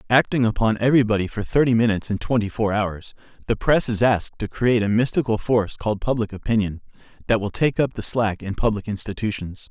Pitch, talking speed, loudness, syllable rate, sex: 110 Hz, 190 wpm, -21 LUFS, 6.2 syllables/s, male